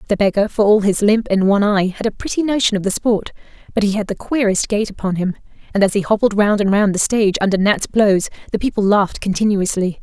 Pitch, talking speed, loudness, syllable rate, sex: 205 Hz, 240 wpm, -17 LUFS, 6.1 syllables/s, female